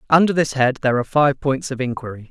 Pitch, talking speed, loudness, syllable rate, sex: 135 Hz, 235 wpm, -19 LUFS, 6.8 syllables/s, male